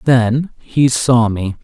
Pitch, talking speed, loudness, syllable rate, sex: 120 Hz, 145 wpm, -15 LUFS, 2.9 syllables/s, male